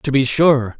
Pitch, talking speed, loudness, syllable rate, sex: 135 Hz, 225 wpm, -15 LUFS, 4.0 syllables/s, male